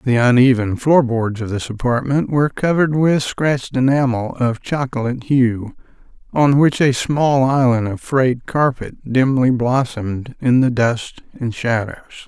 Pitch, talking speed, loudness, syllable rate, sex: 125 Hz, 145 wpm, -17 LUFS, 4.5 syllables/s, male